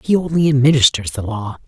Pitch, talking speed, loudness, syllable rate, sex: 130 Hz, 180 wpm, -15 LUFS, 5.9 syllables/s, female